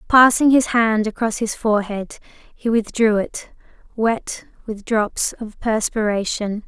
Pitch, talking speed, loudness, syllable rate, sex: 220 Hz, 125 wpm, -19 LUFS, 3.9 syllables/s, female